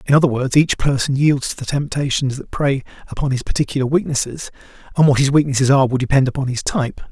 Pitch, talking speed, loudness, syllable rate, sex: 135 Hz, 210 wpm, -18 LUFS, 6.6 syllables/s, male